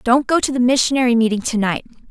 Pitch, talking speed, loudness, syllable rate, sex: 245 Hz, 230 wpm, -17 LUFS, 6.8 syllables/s, female